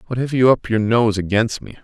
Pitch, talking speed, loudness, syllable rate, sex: 115 Hz, 260 wpm, -17 LUFS, 5.6 syllables/s, male